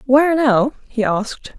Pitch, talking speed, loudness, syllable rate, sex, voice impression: 255 Hz, 150 wpm, -17 LUFS, 4.6 syllables/s, female, feminine, adult-like, relaxed, slightly muffled, raspy, slightly calm, friendly, unique, slightly lively, slightly intense, slightly sharp